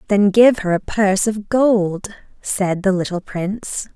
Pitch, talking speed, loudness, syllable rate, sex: 200 Hz, 165 wpm, -17 LUFS, 4.1 syllables/s, female